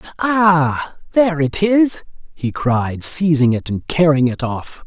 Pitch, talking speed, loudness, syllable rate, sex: 155 Hz, 150 wpm, -16 LUFS, 3.8 syllables/s, male